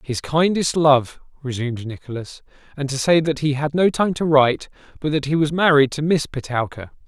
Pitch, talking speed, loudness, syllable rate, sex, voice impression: 145 Hz, 195 wpm, -19 LUFS, 5.3 syllables/s, male, masculine, adult-like, slightly fluent, slightly cool, sincere